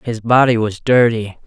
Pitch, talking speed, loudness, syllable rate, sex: 115 Hz, 165 wpm, -15 LUFS, 4.6 syllables/s, male